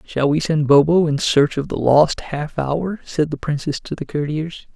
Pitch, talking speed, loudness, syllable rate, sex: 150 Hz, 215 wpm, -18 LUFS, 4.4 syllables/s, male